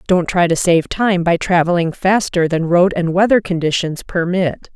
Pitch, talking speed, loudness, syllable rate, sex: 175 Hz, 175 wpm, -15 LUFS, 4.6 syllables/s, female